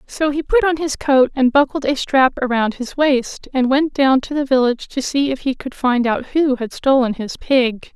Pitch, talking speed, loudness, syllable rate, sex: 265 Hz, 235 wpm, -17 LUFS, 4.7 syllables/s, female